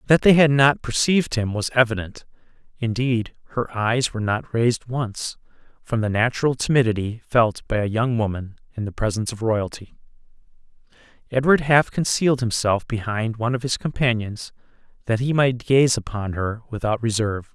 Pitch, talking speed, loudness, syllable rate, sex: 120 Hz, 155 wpm, -21 LUFS, 5.3 syllables/s, male